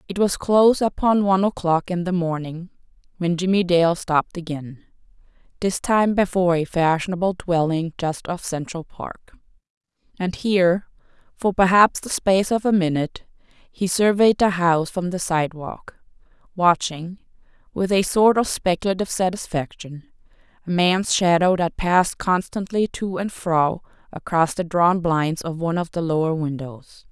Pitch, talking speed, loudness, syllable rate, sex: 180 Hz, 140 wpm, -21 LUFS, 4.8 syllables/s, female